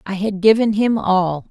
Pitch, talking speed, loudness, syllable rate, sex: 200 Hz, 200 wpm, -16 LUFS, 4.4 syllables/s, female